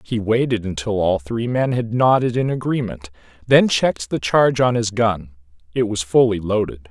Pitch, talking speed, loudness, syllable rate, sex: 110 Hz, 175 wpm, -19 LUFS, 4.9 syllables/s, male